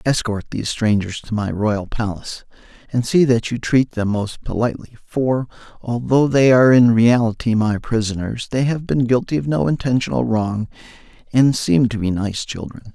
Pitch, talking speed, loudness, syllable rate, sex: 115 Hz, 170 wpm, -18 LUFS, 5.0 syllables/s, male